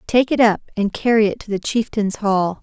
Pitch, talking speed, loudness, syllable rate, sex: 215 Hz, 230 wpm, -18 LUFS, 5.2 syllables/s, female